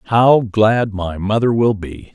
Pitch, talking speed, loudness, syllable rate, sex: 105 Hz, 170 wpm, -16 LUFS, 3.7 syllables/s, male